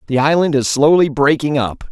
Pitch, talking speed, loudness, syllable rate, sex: 145 Hz, 190 wpm, -14 LUFS, 5.2 syllables/s, male